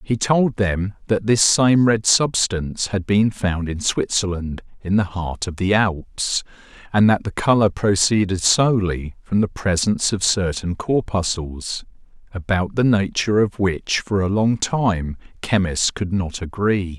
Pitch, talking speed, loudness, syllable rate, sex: 100 Hz, 155 wpm, -19 LUFS, 4.1 syllables/s, male